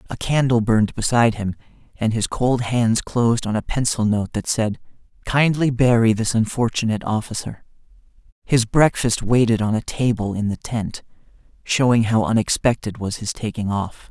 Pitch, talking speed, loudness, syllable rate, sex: 115 Hz, 155 wpm, -20 LUFS, 5.0 syllables/s, male